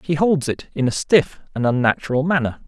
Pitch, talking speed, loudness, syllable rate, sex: 145 Hz, 200 wpm, -19 LUFS, 5.5 syllables/s, male